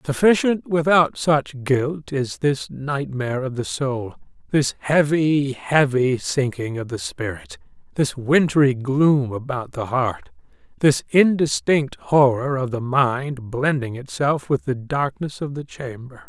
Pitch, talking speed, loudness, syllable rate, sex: 135 Hz, 135 wpm, -21 LUFS, 3.8 syllables/s, male